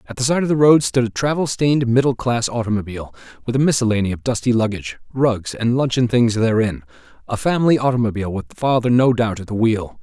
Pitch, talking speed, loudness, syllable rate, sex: 115 Hz, 200 wpm, -18 LUFS, 6.3 syllables/s, male